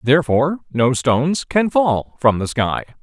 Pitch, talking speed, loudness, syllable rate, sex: 140 Hz, 160 wpm, -18 LUFS, 4.6 syllables/s, male